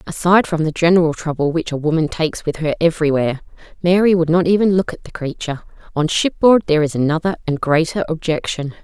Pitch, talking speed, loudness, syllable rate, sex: 165 Hz, 175 wpm, -17 LUFS, 6.5 syllables/s, female